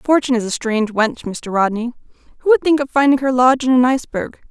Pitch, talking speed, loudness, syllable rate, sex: 250 Hz, 225 wpm, -16 LUFS, 6.5 syllables/s, female